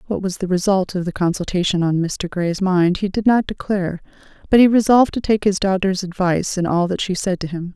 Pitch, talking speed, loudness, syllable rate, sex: 190 Hz, 230 wpm, -18 LUFS, 5.8 syllables/s, female